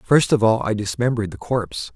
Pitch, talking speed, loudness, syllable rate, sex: 110 Hz, 215 wpm, -20 LUFS, 6.2 syllables/s, male